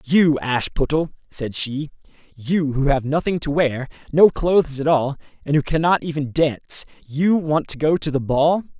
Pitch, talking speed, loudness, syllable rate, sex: 150 Hz, 170 wpm, -20 LUFS, 4.7 syllables/s, male